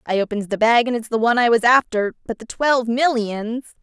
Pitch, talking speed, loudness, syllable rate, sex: 230 Hz, 220 wpm, -18 LUFS, 5.8 syllables/s, female